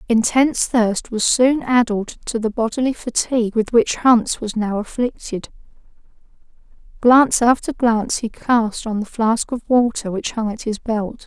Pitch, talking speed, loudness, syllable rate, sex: 230 Hz, 160 wpm, -18 LUFS, 4.5 syllables/s, female